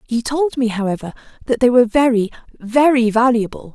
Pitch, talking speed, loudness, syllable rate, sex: 240 Hz, 145 wpm, -16 LUFS, 5.6 syllables/s, female